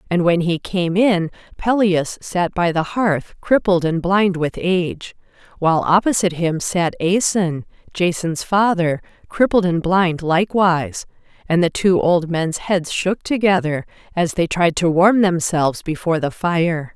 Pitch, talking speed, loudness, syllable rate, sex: 175 Hz, 150 wpm, -18 LUFS, 4.3 syllables/s, female